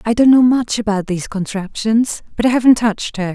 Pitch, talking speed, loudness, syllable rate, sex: 220 Hz, 215 wpm, -15 LUFS, 5.8 syllables/s, female